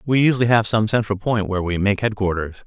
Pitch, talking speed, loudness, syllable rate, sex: 105 Hz, 225 wpm, -19 LUFS, 6.3 syllables/s, male